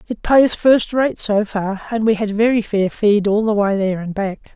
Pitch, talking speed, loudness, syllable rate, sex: 210 Hz, 235 wpm, -17 LUFS, 4.8 syllables/s, female